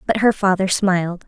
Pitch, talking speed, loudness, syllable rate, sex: 190 Hz, 190 wpm, -18 LUFS, 5.3 syllables/s, female